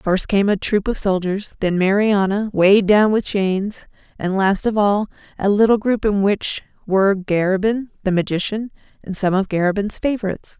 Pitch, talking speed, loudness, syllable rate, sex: 200 Hz, 170 wpm, -18 LUFS, 4.9 syllables/s, female